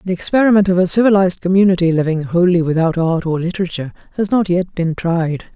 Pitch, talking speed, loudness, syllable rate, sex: 180 Hz, 185 wpm, -15 LUFS, 6.5 syllables/s, female